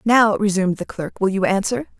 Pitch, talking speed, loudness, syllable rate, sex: 200 Hz, 210 wpm, -19 LUFS, 5.7 syllables/s, female